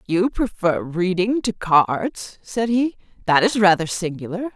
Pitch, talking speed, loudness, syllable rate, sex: 200 Hz, 160 wpm, -20 LUFS, 4.2 syllables/s, female